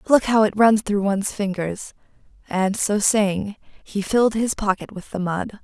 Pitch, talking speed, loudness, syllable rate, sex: 205 Hz, 180 wpm, -21 LUFS, 4.4 syllables/s, female